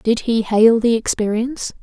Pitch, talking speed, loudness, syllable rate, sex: 230 Hz, 165 wpm, -17 LUFS, 4.6 syllables/s, female